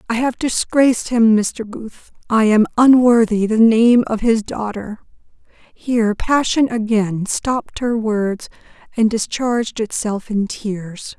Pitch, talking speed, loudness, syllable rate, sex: 225 Hz, 130 wpm, -17 LUFS, 3.9 syllables/s, female